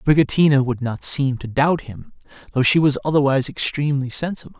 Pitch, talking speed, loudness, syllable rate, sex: 140 Hz, 170 wpm, -19 LUFS, 6.1 syllables/s, male